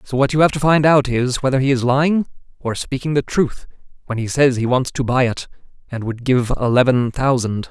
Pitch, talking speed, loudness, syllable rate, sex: 130 Hz, 225 wpm, -17 LUFS, 5.4 syllables/s, male